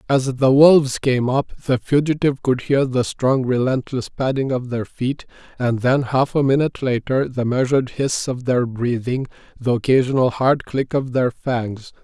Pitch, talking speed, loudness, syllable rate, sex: 130 Hz, 175 wpm, -19 LUFS, 4.7 syllables/s, male